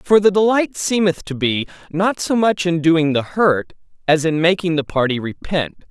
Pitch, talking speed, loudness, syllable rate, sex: 170 Hz, 195 wpm, -18 LUFS, 4.6 syllables/s, male